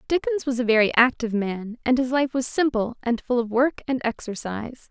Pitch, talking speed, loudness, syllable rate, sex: 245 Hz, 210 wpm, -23 LUFS, 5.4 syllables/s, female